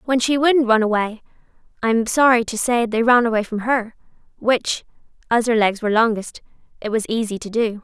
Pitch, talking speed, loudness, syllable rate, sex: 230 Hz, 200 wpm, -19 LUFS, 5.4 syllables/s, female